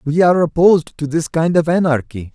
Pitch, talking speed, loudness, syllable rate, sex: 160 Hz, 205 wpm, -15 LUFS, 5.8 syllables/s, male